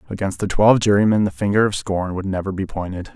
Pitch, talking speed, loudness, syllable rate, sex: 100 Hz, 230 wpm, -19 LUFS, 6.4 syllables/s, male